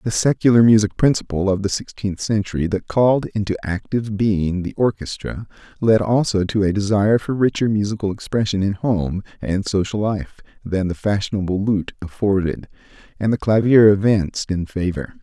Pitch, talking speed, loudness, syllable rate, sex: 100 Hz, 160 wpm, -19 LUFS, 5.2 syllables/s, male